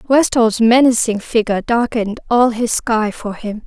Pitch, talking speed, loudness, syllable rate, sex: 230 Hz, 145 wpm, -15 LUFS, 4.7 syllables/s, female